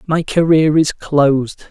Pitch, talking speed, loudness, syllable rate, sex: 150 Hz, 140 wpm, -14 LUFS, 3.9 syllables/s, male